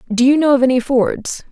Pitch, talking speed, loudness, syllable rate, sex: 260 Hz, 235 wpm, -15 LUFS, 5.7 syllables/s, female